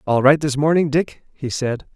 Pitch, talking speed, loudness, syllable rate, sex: 145 Hz, 215 wpm, -18 LUFS, 4.8 syllables/s, male